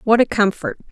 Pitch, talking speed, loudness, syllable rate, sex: 210 Hz, 195 wpm, -18 LUFS, 5.7 syllables/s, female